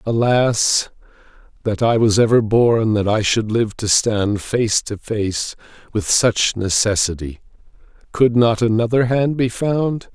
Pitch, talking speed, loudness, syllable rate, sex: 110 Hz, 140 wpm, -17 LUFS, 3.8 syllables/s, male